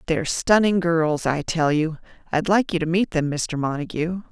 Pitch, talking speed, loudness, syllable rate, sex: 165 Hz, 180 wpm, -22 LUFS, 4.8 syllables/s, female